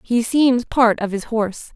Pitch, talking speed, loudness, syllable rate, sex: 230 Hz, 205 wpm, -18 LUFS, 4.3 syllables/s, female